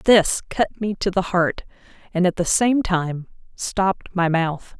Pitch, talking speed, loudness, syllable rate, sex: 185 Hz, 175 wpm, -21 LUFS, 3.8 syllables/s, female